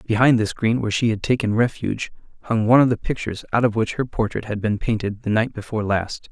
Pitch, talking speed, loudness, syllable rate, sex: 110 Hz, 240 wpm, -21 LUFS, 6.4 syllables/s, male